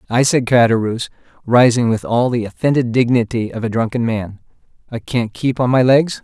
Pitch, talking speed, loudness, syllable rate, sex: 120 Hz, 185 wpm, -16 LUFS, 5.4 syllables/s, male